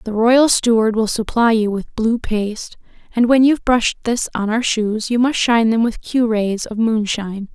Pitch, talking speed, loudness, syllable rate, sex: 225 Hz, 205 wpm, -17 LUFS, 4.9 syllables/s, female